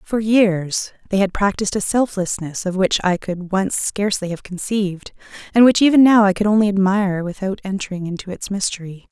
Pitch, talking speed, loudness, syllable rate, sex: 195 Hz, 185 wpm, -18 LUFS, 5.5 syllables/s, female